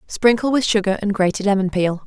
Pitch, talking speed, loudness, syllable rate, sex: 205 Hz, 205 wpm, -18 LUFS, 5.9 syllables/s, female